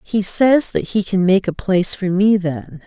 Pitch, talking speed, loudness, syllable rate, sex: 190 Hz, 230 wpm, -16 LUFS, 4.4 syllables/s, female